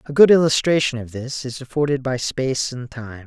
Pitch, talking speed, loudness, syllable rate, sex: 130 Hz, 200 wpm, -19 LUFS, 5.4 syllables/s, male